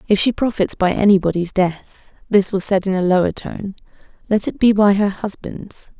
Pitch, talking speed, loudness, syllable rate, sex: 195 Hz, 190 wpm, -17 LUFS, 4.9 syllables/s, female